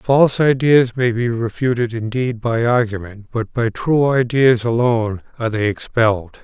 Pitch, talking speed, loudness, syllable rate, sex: 120 Hz, 150 wpm, -17 LUFS, 4.7 syllables/s, male